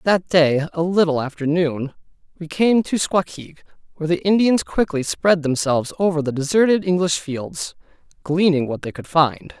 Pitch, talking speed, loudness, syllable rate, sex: 165 Hz, 165 wpm, -19 LUFS, 4.9 syllables/s, male